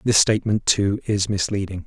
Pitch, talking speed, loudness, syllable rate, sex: 100 Hz, 160 wpm, -20 LUFS, 5.2 syllables/s, male